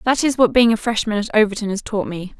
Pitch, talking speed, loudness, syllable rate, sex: 220 Hz, 275 wpm, -18 LUFS, 6.3 syllables/s, female